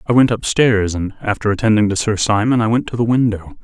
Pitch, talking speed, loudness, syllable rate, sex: 110 Hz, 230 wpm, -16 LUFS, 6.0 syllables/s, male